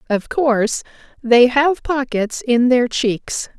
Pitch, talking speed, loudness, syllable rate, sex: 250 Hz, 135 wpm, -17 LUFS, 3.4 syllables/s, female